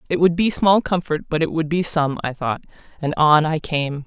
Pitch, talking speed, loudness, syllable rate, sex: 160 Hz, 235 wpm, -20 LUFS, 5.0 syllables/s, female